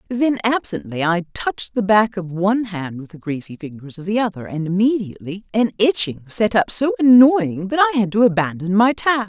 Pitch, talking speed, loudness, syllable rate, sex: 200 Hz, 200 wpm, -18 LUFS, 5.4 syllables/s, female